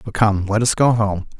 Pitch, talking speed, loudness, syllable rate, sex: 105 Hz, 260 wpm, -18 LUFS, 5.0 syllables/s, male